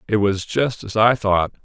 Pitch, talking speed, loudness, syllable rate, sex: 110 Hz, 220 wpm, -19 LUFS, 4.4 syllables/s, male